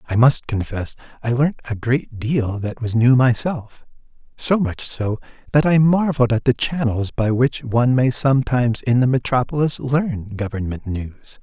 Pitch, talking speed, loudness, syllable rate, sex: 125 Hz, 170 wpm, -19 LUFS, 4.6 syllables/s, male